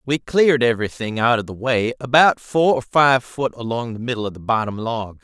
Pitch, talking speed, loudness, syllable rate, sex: 120 Hz, 220 wpm, -19 LUFS, 5.4 syllables/s, male